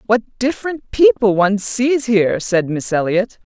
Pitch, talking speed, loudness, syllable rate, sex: 210 Hz, 150 wpm, -16 LUFS, 4.6 syllables/s, female